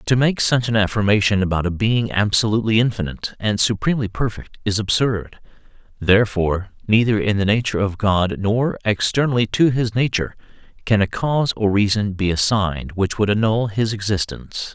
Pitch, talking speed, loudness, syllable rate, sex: 105 Hz, 160 wpm, -19 LUFS, 5.6 syllables/s, male